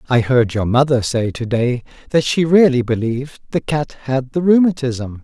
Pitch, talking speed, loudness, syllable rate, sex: 130 Hz, 185 wpm, -17 LUFS, 4.8 syllables/s, male